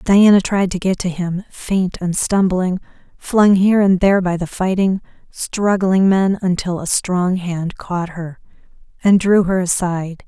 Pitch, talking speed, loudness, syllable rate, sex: 185 Hz, 165 wpm, -17 LUFS, 4.2 syllables/s, female